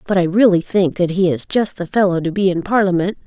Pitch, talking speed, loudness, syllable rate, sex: 185 Hz, 255 wpm, -16 LUFS, 5.9 syllables/s, female